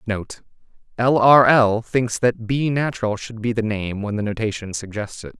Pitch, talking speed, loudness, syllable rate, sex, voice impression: 115 Hz, 180 wpm, -20 LUFS, 4.7 syllables/s, male, masculine, adult-like, slightly thin, tensed, slightly powerful, bright, fluent, intellectual, refreshing, friendly, reassuring, slightly wild, lively, kind, light